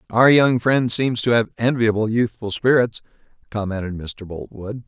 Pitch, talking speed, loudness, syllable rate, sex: 115 Hz, 150 wpm, -19 LUFS, 4.6 syllables/s, male